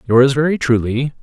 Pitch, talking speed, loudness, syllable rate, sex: 130 Hz, 145 wpm, -15 LUFS, 5.0 syllables/s, male